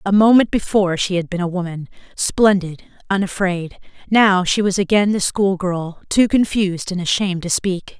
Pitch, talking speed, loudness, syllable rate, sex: 190 Hz, 165 wpm, -17 LUFS, 4.9 syllables/s, female